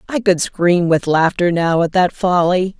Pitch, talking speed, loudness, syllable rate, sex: 175 Hz, 195 wpm, -15 LUFS, 4.2 syllables/s, female